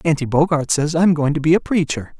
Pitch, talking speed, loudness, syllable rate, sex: 155 Hz, 245 wpm, -17 LUFS, 5.8 syllables/s, male